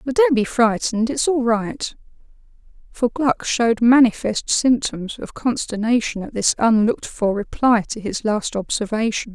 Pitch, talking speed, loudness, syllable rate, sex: 230 Hz, 140 wpm, -19 LUFS, 4.7 syllables/s, female